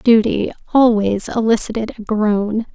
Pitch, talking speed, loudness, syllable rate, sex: 220 Hz, 110 wpm, -17 LUFS, 4.2 syllables/s, female